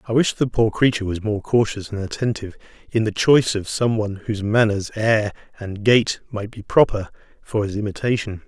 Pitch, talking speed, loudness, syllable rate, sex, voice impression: 110 Hz, 190 wpm, -21 LUFS, 5.6 syllables/s, male, masculine, middle-aged, thick, powerful, slightly soft, slightly muffled, raspy, sincere, mature, friendly, reassuring, wild, slightly strict, slightly modest